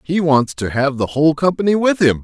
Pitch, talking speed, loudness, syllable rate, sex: 150 Hz, 240 wpm, -16 LUFS, 5.6 syllables/s, male